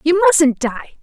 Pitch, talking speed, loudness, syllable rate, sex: 310 Hz, 175 wpm, -15 LUFS, 5.4 syllables/s, female